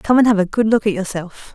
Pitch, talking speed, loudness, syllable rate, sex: 205 Hz, 310 wpm, -17 LUFS, 6.0 syllables/s, female